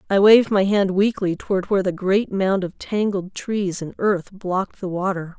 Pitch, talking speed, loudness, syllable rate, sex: 195 Hz, 200 wpm, -20 LUFS, 4.9 syllables/s, female